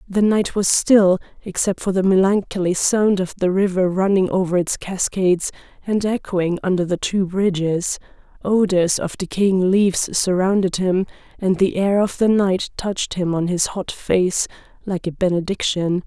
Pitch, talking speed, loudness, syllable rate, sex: 190 Hz, 160 wpm, -19 LUFS, 4.6 syllables/s, female